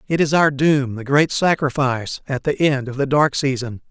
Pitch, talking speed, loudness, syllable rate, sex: 140 Hz, 200 wpm, -18 LUFS, 5.0 syllables/s, male